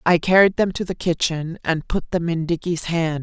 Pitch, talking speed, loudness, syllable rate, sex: 170 Hz, 225 wpm, -20 LUFS, 4.9 syllables/s, female